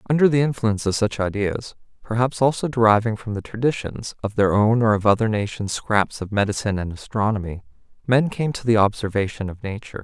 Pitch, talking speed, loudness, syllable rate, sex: 110 Hz, 185 wpm, -21 LUFS, 6.0 syllables/s, male